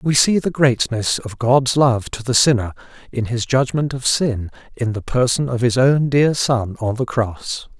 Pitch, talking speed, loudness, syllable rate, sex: 125 Hz, 200 wpm, -18 LUFS, 4.3 syllables/s, male